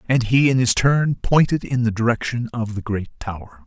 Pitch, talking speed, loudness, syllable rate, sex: 120 Hz, 215 wpm, -19 LUFS, 5.0 syllables/s, male